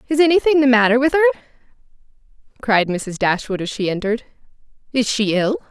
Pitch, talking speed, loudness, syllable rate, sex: 240 Hz, 145 wpm, -17 LUFS, 6.4 syllables/s, female